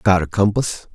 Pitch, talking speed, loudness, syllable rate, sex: 95 Hz, 190 wpm, -19 LUFS, 4.6 syllables/s, male